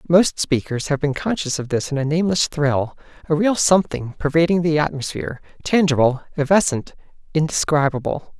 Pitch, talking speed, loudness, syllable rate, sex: 155 Hz, 145 wpm, -20 LUFS, 5.6 syllables/s, male